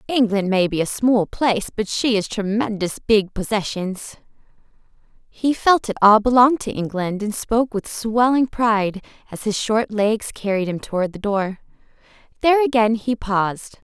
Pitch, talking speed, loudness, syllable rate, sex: 215 Hz, 160 wpm, -19 LUFS, 4.8 syllables/s, female